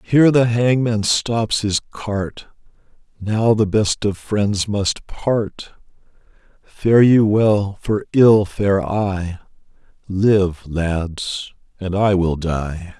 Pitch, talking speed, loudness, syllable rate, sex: 100 Hz, 120 wpm, -18 LUFS, 2.9 syllables/s, male